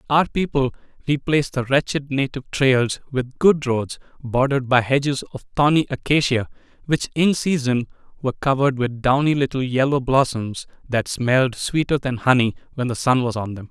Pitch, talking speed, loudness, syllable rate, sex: 130 Hz, 160 wpm, -20 LUFS, 5.2 syllables/s, male